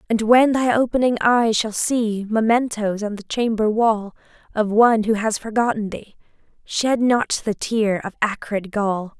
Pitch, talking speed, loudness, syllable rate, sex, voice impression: 220 Hz, 165 wpm, -20 LUFS, 4.3 syllables/s, female, very feminine, slightly young, thin, tensed, slightly powerful, bright, slightly soft, very clear, fluent, very cute, slightly cool, intellectual, very refreshing, very sincere, slightly calm, very friendly, very reassuring, unique, very elegant, slightly wild, sweet, lively, strict, slightly intense